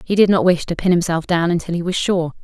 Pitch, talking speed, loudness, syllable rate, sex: 175 Hz, 295 wpm, -17 LUFS, 6.2 syllables/s, female